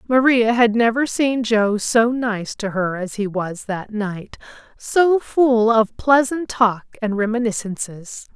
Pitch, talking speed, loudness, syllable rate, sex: 225 Hz, 150 wpm, -19 LUFS, 3.7 syllables/s, female